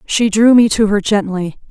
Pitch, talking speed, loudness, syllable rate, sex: 210 Hz, 210 wpm, -13 LUFS, 4.7 syllables/s, female